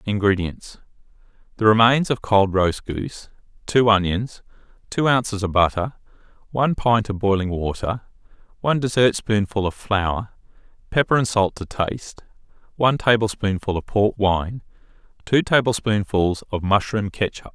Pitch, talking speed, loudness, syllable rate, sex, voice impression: 105 Hz, 125 wpm, -21 LUFS, 4.8 syllables/s, male, very masculine, very adult-like, slightly middle-aged, very thick, slightly relaxed, slightly weak, bright, hard, clear, fluent, slightly raspy, cool, intellectual, very sincere, very calm, mature, friendly, reassuring, slightly unique, elegant, very sweet, kind, slightly modest